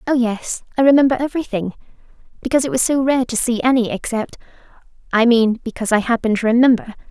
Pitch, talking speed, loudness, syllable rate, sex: 240 Hz, 170 wpm, -17 LUFS, 6.9 syllables/s, female